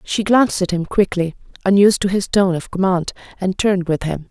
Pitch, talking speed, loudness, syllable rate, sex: 190 Hz, 210 wpm, -17 LUFS, 5.7 syllables/s, female